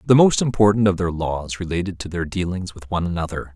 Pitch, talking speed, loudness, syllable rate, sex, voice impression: 90 Hz, 220 wpm, -21 LUFS, 6.2 syllables/s, male, masculine, adult-like, slightly thick, slightly fluent, slightly intellectual, slightly refreshing, slightly calm